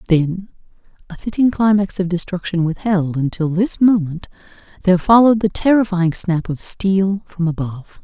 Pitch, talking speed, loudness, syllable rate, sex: 185 Hz, 125 wpm, -17 LUFS, 5.0 syllables/s, female